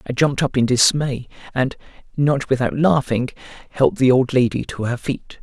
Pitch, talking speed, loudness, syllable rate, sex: 130 Hz, 175 wpm, -19 LUFS, 5.3 syllables/s, male